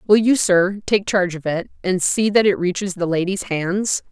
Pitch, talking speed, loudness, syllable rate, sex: 190 Hz, 220 wpm, -19 LUFS, 4.9 syllables/s, female